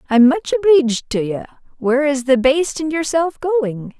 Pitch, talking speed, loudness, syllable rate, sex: 285 Hz, 180 wpm, -17 LUFS, 5.4 syllables/s, female